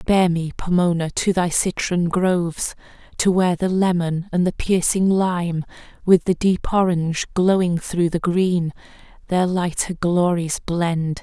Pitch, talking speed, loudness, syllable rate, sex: 175 Hz, 145 wpm, -20 LUFS, 4.1 syllables/s, female